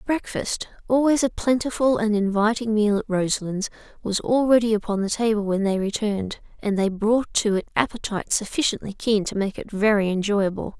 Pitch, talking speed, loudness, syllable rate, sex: 215 Hz, 155 wpm, -23 LUFS, 5.4 syllables/s, female